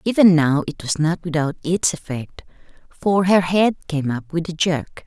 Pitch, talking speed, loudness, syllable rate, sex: 165 Hz, 190 wpm, -19 LUFS, 4.4 syllables/s, female